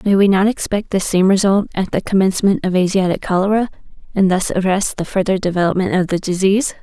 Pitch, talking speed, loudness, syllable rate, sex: 190 Hz, 195 wpm, -16 LUFS, 6.2 syllables/s, female